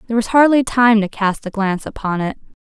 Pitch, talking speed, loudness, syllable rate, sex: 220 Hz, 230 wpm, -16 LUFS, 6.3 syllables/s, female